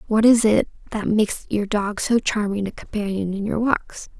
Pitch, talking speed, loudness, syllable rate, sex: 210 Hz, 200 wpm, -21 LUFS, 4.9 syllables/s, female